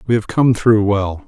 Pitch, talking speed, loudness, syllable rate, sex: 110 Hz, 235 wpm, -15 LUFS, 4.5 syllables/s, male